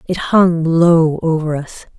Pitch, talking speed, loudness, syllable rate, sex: 165 Hz, 150 wpm, -14 LUFS, 3.5 syllables/s, female